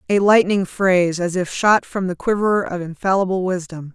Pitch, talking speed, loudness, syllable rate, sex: 185 Hz, 180 wpm, -18 LUFS, 5.0 syllables/s, female